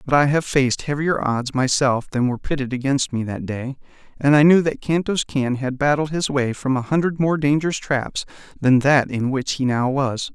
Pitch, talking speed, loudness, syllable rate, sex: 135 Hz, 215 wpm, -20 LUFS, 5.1 syllables/s, male